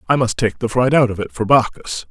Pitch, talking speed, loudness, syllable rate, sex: 115 Hz, 285 wpm, -17 LUFS, 5.7 syllables/s, male